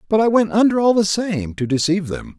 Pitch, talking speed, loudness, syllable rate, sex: 190 Hz, 250 wpm, -17 LUFS, 5.9 syllables/s, male